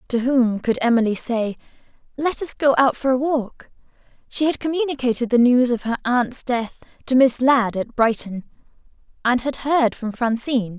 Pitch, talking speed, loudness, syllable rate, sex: 250 Hz, 170 wpm, -20 LUFS, 4.8 syllables/s, female